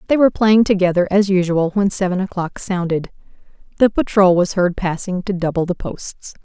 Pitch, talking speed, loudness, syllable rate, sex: 185 Hz, 175 wpm, -17 LUFS, 5.3 syllables/s, female